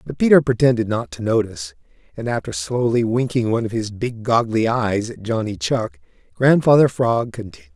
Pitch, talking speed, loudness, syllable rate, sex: 115 Hz, 170 wpm, -19 LUFS, 5.4 syllables/s, male